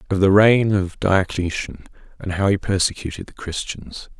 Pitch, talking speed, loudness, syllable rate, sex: 95 Hz, 155 wpm, -19 LUFS, 4.7 syllables/s, male